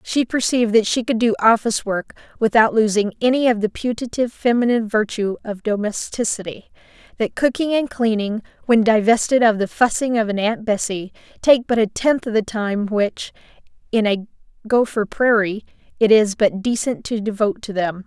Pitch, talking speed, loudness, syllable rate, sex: 220 Hz, 170 wpm, -19 LUFS, 5.3 syllables/s, female